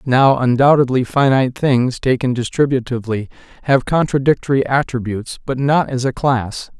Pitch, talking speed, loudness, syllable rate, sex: 130 Hz, 125 wpm, -16 LUFS, 5.2 syllables/s, male